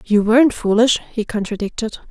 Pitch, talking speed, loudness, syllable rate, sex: 225 Hz, 145 wpm, -17 LUFS, 5.5 syllables/s, female